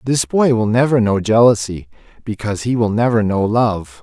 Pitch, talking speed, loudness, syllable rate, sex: 110 Hz, 180 wpm, -16 LUFS, 5.1 syllables/s, male